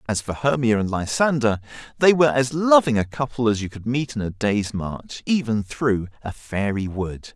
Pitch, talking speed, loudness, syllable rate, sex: 120 Hz, 195 wpm, -22 LUFS, 4.9 syllables/s, male